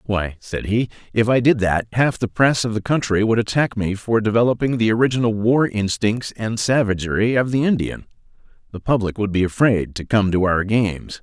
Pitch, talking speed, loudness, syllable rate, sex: 110 Hz, 200 wpm, -19 LUFS, 5.2 syllables/s, male